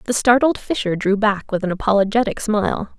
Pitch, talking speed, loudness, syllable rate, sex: 210 Hz, 180 wpm, -18 LUFS, 5.8 syllables/s, female